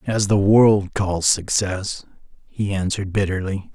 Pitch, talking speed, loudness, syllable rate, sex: 95 Hz, 130 wpm, -19 LUFS, 4.0 syllables/s, male